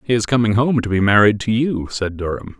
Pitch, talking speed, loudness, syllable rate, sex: 110 Hz, 255 wpm, -17 LUFS, 5.7 syllables/s, male